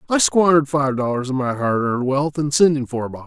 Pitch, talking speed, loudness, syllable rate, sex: 140 Hz, 255 wpm, -19 LUFS, 6.5 syllables/s, male